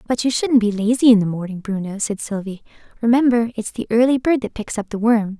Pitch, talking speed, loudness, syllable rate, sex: 225 Hz, 235 wpm, -19 LUFS, 5.9 syllables/s, female